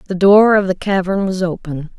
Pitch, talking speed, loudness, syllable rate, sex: 190 Hz, 210 wpm, -14 LUFS, 5.1 syllables/s, female